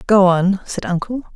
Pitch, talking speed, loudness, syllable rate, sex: 195 Hz, 175 wpm, -17 LUFS, 4.6 syllables/s, female